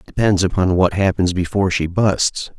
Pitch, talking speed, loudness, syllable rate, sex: 95 Hz, 160 wpm, -17 LUFS, 5.0 syllables/s, male